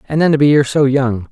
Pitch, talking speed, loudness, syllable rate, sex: 140 Hz, 320 wpm, -13 LUFS, 7.0 syllables/s, male